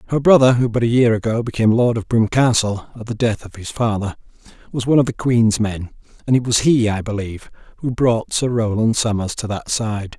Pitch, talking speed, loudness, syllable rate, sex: 115 Hz, 220 wpm, -18 LUFS, 5.8 syllables/s, male